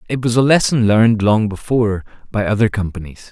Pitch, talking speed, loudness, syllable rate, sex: 110 Hz, 180 wpm, -16 LUFS, 5.9 syllables/s, male